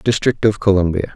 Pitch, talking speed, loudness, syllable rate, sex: 100 Hz, 155 wpm, -16 LUFS, 5.4 syllables/s, male